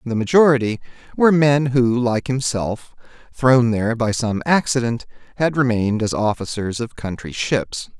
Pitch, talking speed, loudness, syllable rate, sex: 120 Hz, 145 wpm, -19 LUFS, 4.8 syllables/s, male